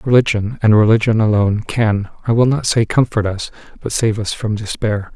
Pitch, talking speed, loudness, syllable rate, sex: 110 Hz, 165 wpm, -16 LUFS, 5.2 syllables/s, male